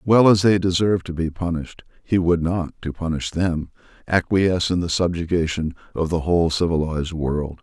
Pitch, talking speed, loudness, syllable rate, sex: 85 Hz, 175 wpm, -21 LUFS, 5.3 syllables/s, male